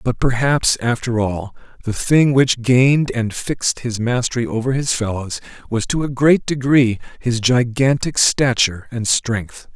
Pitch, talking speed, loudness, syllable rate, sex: 120 Hz, 155 wpm, -17 LUFS, 4.3 syllables/s, male